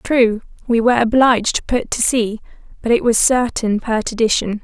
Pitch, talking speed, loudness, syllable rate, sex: 230 Hz, 170 wpm, -16 LUFS, 4.8 syllables/s, female